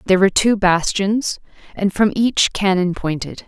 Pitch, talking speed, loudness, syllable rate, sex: 195 Hz, 155 wpm, -17 LUFS, 4.6 syllables/s, female